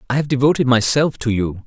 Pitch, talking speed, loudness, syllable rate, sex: 125 Hz, 215 wpm, -17 LUFS, 6.0 syllables/s, male